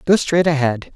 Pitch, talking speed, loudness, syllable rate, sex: 150 Hz, 190 wpm, -17 LUFS, 4.9 syllables/s, male